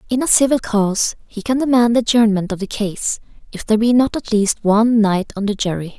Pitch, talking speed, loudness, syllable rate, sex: 220 Hz, 230 wpm, -16 LUFS, 5.8 syllables/s, female